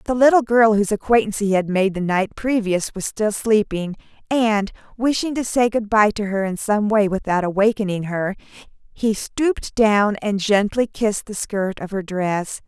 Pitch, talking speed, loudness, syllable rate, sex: 210 Hz, 185 wpm, -20 LUFS, 4.8 syllables/s, female